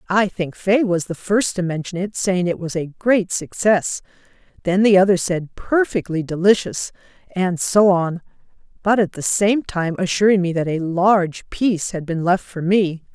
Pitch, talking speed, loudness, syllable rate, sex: 185 Hz, 185 wpm, -19 LUFS, 4.6 syllables/s, female